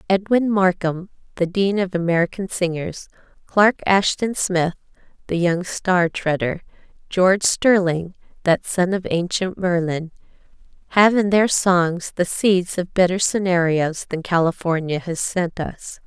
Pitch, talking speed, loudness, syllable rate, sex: 180 Hz, 130 wpm, -20 LUFS, 4.1 syllables/s, female